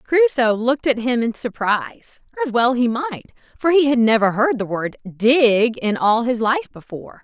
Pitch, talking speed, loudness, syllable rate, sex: 245 Hz, 190 wpm, -18 LUFS, 4.7 syllables/s, female